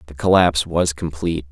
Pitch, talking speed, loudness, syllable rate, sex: 80 Hz, 160 wpm, -18 LUFS, 6.1 syllables/s, male